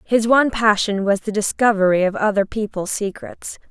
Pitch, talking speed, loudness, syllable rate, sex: 210 Hz, 160 wpm, -18 LUFS, 5.2 syllables/s, female